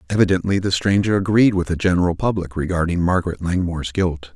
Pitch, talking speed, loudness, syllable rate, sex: 90 Hz, 165 wpm, -19 LUFS, 6.2 syllables/s, male